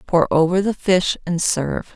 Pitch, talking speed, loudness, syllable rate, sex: 175 Hz, 185 wpm, -19 LUFS, 4.7 syllables/s, female